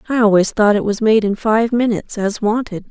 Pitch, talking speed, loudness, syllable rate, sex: 215 Hz, 225 wpm, -16 LUFS, 5.6 syllables/s, female